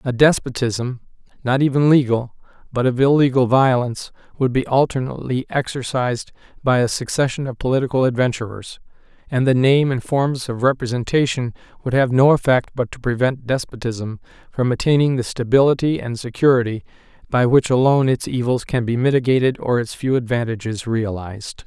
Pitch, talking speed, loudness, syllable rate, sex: 125 Hz, 145 wpm, -19 LUFS, 5.6 syllables/s, male